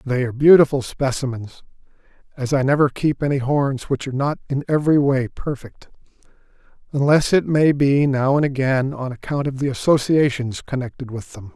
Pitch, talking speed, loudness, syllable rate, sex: 135 Hz, 165 wpm, -19 LUFS, 5.3 syllables/s, male